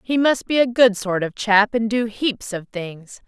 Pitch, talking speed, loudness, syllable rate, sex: 220 Hz, 240 wpm, -19 LUFS, 4.2 syllables/s, female